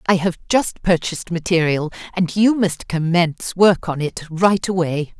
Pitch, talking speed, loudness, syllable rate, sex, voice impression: 175 Hz, 160 wpm, -19 LUFS, 4.6 syllables/s, female, very feminine, very adult-like, intellectual, slightly calm, elegant